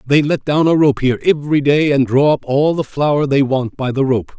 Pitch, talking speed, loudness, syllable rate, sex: 140 Hz, 260 wpm, -15 LUFS, 5.3 syllables/s, male